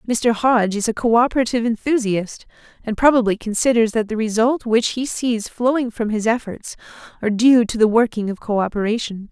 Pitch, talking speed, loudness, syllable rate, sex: 225 Hz, 165 wpm, -18 LUFS, 5.7 syllables/s, female